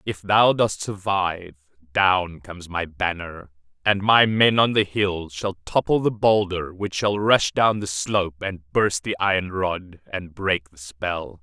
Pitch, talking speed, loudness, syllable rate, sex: 95 Hz, 175 wpm, -22 LUFS, 4.0 syllables/s, male